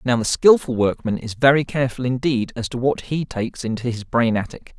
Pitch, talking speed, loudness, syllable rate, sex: 125 Hz, 215 wpm, -20 LUFS, 5.6 syllables/s, male